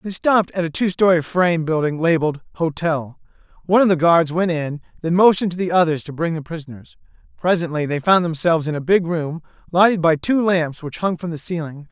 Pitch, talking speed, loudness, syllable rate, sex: 165 Hz, 210 wpm, -19 LUFS, 5.9 syllables/s, male